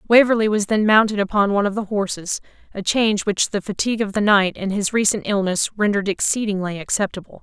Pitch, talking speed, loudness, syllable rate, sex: 205 Hz, 195 wpm, -19 LUFS, 6.2 syllables/s, female